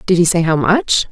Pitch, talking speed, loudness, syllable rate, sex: 180 Hz, 270 wpm, -14 LUFS, 5.2 syllables/s, female